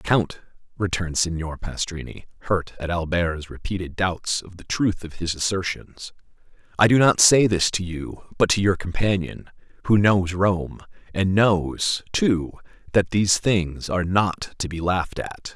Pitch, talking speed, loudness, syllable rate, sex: 90 Hz, 160 wpm, -22 LUFS, 4.3 syllables/s, male